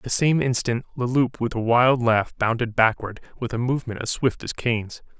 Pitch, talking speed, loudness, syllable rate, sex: 120 Hz, 220 wpm, -22 LUFS, 5.3 syllables/s, male